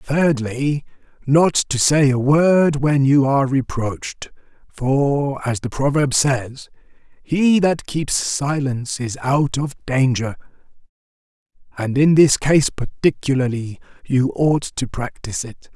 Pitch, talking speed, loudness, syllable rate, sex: 135 Hz, 125 wpm, -18 LUFS, 3.7 syllables/s, male